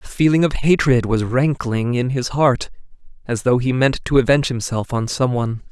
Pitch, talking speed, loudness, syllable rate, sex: 125 Hz, 200 wpm, -18 LUFS, 5.2 syllables/s, male